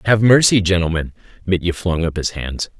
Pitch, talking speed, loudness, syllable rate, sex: 90 Hz, 170 wpm, -17 LUFS, 5.3 syllables/s, male